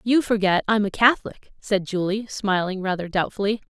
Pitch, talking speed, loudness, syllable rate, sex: 205 Hz, 160 wpm, -22 LUFS, 5.3 syllables/s, female